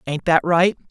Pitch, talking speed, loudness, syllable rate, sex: 170 Hz, 200 wpm, -18 LUFS, 4.6 syllables/s, male